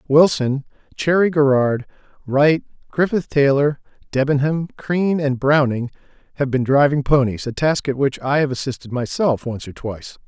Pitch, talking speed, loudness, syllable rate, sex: 140 Hz, 145 wpm, -19 LUFS, 4.8 syllables/s, male